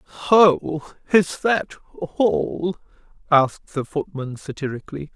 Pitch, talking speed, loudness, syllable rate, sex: 155 Hz, 95 wpm, -21 LUFS, 3.8 syllables/s, male